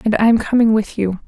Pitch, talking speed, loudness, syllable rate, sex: 215 Hz, 235 wpm, -16 LUFS, 5.5 syllables/s, female